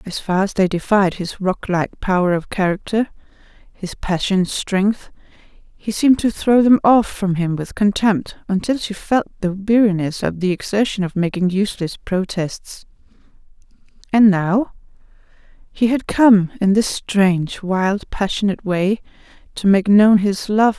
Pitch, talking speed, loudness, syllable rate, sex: 195 Hz, 150 wpm, -18 LUFS, 4.3 syllables/s, female